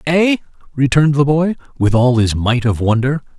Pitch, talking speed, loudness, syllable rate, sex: 135 Hz, 175 wpm, -15 LUFS, 5.2 syllables/s, male